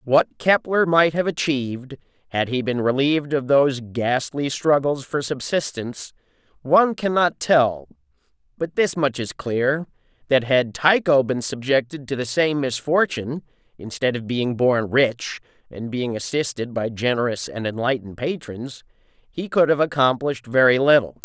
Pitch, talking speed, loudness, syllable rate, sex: 135 Hz, 145 wpm, -21 LUFS, 4.6 syllables/s, male